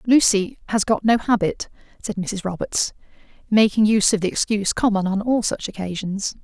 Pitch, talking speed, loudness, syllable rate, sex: 210 Hz, 170 wpm, -20 LUFS, 5.4 syllables/s, female